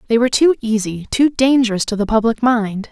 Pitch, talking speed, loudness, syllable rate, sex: 230 Hz, 205 wpm, -16 LUFS, 5.7 syllables/s, female